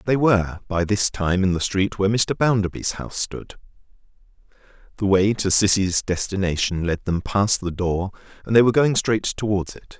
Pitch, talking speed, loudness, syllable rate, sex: 100 Hz, 180 wpm, -21 LUFS, 5.1 syllables/s, male